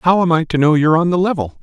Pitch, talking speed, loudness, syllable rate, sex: 160 Hz, 330 wpm, -15 LUFS, 6.9 syllables/s, male